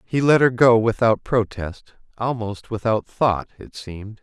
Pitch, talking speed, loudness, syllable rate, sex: 110 Hz, 155 wpm, -20 LUFS, 4.4 syllables/s, male